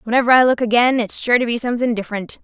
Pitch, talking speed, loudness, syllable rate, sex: 235 Hz, 245 wpm, -16 LUFS, 7.4 syllables/s, female